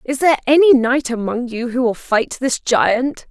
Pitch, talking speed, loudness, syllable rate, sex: 250 Hz, 200 wpm, -16 LUFS, 4.5 syllables/s, female